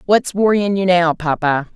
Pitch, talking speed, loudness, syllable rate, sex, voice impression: 180 Hz, 170 wpm, -16 LUFS, 4.4 syllables/s, female, feminine, adult-like, slightly intellectual, slightly elegant, slightly strict